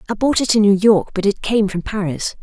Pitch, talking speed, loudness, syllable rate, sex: 205 Hz, 270 wpm, -17 LUFS, 5.6 syllables/s, female